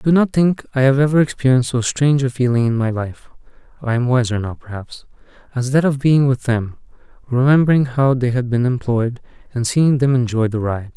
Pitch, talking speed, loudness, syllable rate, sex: 130 Hz, 210 wpm, -17 LUFS, 5.3 syllables/s, male